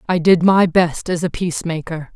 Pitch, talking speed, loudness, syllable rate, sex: 170 Hz, 195 wpm, -17 LUFS, 5.0 syllables/s, female